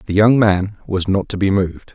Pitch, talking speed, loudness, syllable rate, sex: 100 Hz, 245 wpm, -17 LUFS, 5.0 syllables/s, male